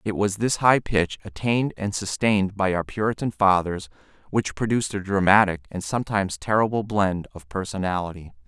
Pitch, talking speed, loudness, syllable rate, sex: 100 Hz, 155 wpm, -23 LUFS, 5.5 syllables/s, male